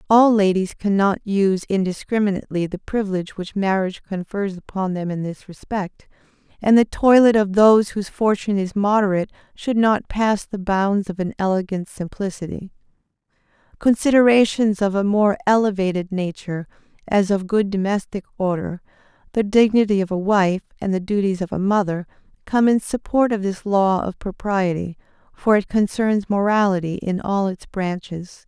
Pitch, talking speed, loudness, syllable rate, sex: 200 Hz, 150 wpm, -20 LUFS, 5.2 syllables/s, female